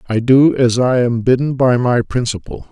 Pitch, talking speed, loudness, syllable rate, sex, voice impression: 125 Hz, 200 wpm, -14 LUFS, 4.7 syllables/s, male, masculine, middle-aged, thick, tensed, slightly powerful, hard, intellectual, sincere, calm, mature, reassuring, wild, slightly lively, slightly kind